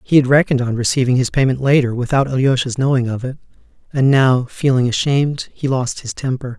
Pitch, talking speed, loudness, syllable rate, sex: 130 Hz, 190 wpm, -16 LUFS, 5.9 syllables/s, male